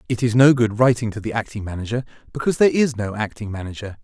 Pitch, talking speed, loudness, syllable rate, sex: 115 Hz, 225 wpm, -20 LUFS, 7.1 syllables/s, male